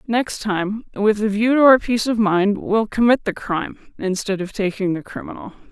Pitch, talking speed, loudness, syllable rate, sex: 215 Hz, 200 wpm, -19 LUFS, 3.9 syllables/s, female